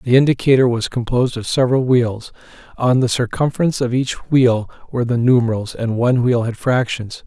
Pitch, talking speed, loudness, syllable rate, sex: 125 Hz, 175 wpm, -17 LUFS, 5.7 syllables/s, male